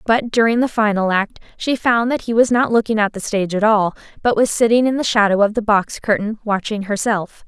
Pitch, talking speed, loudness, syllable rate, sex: 220 Hz, 235 wpm, -17 LUFS, 5.6 syllables/s, female